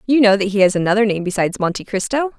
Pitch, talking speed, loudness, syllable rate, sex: 210 Hz, 250 wpm, -17 LUFS, 7.4 syllables/s, female